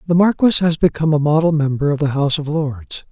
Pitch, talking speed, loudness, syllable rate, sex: 155 Hz, 230 wpm, -16 LUFS, 6.3 syllables/s, male